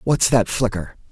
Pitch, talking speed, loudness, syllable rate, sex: 110 Hz, 160 wpm, -19 LUFS, 4.4 syllables/s, male